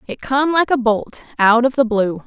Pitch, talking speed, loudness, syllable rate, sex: 240 Hz, 240 wpm, -16 LUFS, 4.6 syllables/s, female